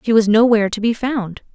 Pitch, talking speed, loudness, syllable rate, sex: 220 Hz, 235 wpm, -16 LUFS, 5.9 syllables/s, female